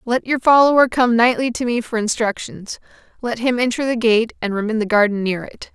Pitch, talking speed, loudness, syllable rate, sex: 235 Hz, 220 wpm, -17 LUFS, 5.7 syllables/s, female